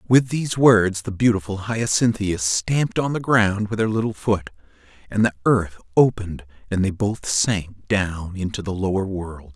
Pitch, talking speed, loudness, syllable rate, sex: 100 Hz, 170 wpm, -21 LUFS, 4.5 syllables/s, male